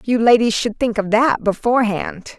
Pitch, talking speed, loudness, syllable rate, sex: 225 Hz, 175 wpm, -17 LUFS, 4.8 syllables/s, female